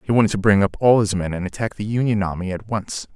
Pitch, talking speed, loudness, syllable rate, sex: 100 Hz, 285 wpm, -20 LUFS, 6.4 syllables/s, male